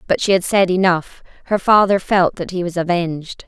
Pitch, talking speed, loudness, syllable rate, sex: 180 Hz, 205 wpm, -17 LUFS, 5.3 syllables/s, female